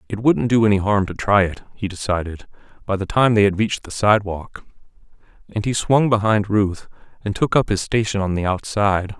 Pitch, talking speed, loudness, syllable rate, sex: 105 Hz, 200 wpm, -19 LUFS, 5.5 syllables/s, male